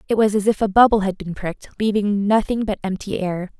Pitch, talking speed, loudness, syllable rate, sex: 205 Hz, 235 wpm, -20 LUFS, 5.9 syllables/s, female